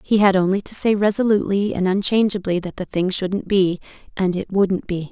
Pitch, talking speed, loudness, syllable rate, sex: 195 Hz, 200 wpm, -19 LUFS, 5.4 syllables/s, female